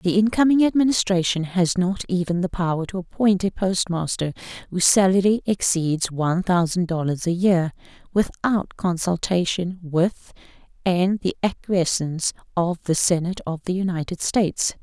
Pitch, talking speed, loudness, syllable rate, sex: 180 Hz, 135 wpm, -22 LUFS, 4.8 syllables/s, female